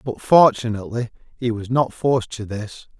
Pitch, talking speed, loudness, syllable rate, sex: 115 Hz, 160 wpm, -20 LUFS, 5.2 syllables/s, male